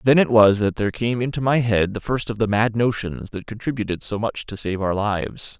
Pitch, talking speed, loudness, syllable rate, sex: 110 Hz, 245 wpm, -21 LUFS, 5.5 syllables/s, male